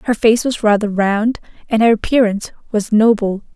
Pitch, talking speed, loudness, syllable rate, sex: 220 Hz, 170 wpm, -15 LUFS, 5.0 syllables/s, female